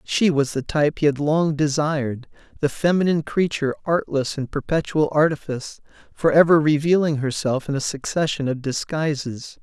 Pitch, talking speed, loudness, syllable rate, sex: 150 Hz, 150 wpm, -21 LUFS, 5.3 syllables/s, male